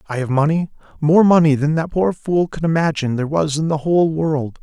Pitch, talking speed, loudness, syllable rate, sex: 155 Hz, 220 wpm, -17 LUFS, 5.8 syllables/s, male